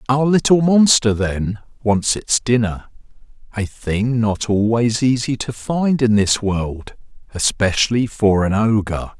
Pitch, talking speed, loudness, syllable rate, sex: 115 Hz, 135 wpm, -17 LUFS, 3.9 syllables/s, male